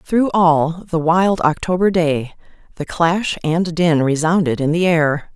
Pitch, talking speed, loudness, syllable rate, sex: 165 Hz, 155 wpm, -16 LUFS, 3.8 syllables/s, female